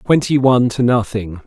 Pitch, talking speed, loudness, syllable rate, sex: 120 Hz, 165 wpm, -15 LUFS, 5.3 syllables/s, male